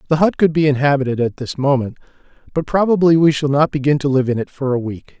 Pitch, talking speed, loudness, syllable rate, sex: 140 Hz, 240 wpm, -16 LUFS, 6.5 syllables/s, male